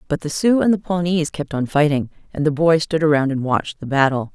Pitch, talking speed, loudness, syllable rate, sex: 155 Hz, 250 wpm, -19 LUFS, 5.8 syllables/s, female